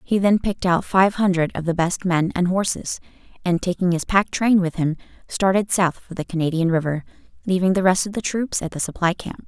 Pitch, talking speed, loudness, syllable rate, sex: 180 Hz, 220 wpm, -21 LUFS, 5.5 syllables/s, female